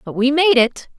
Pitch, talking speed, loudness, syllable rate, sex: 265 Hz, 245 wpm, -15 LUFS, 5.4 syllables/s, female